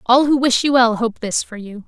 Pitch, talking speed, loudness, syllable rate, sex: 240 Hz, 290 wpm, -16 LUFS, 5.1 syllables/s, female